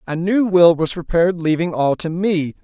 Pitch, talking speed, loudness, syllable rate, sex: 170 Hz, 205 wpm, -17 LUFS, 4.9 syllables/s, male